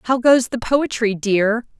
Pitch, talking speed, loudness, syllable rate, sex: 235 Hz, 165 wpm, -18 LUFS, 3.6 syllables/s, female